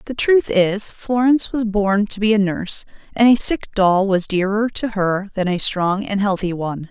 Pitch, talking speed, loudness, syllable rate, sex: 205 Hz, 210 wpm, -18 LUFS, 4.7 syllables/s, female